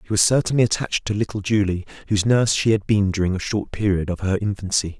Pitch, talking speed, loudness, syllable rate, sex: 100 Hz, 230 wpm, -21 LUFS, 6.8 syllables/s, male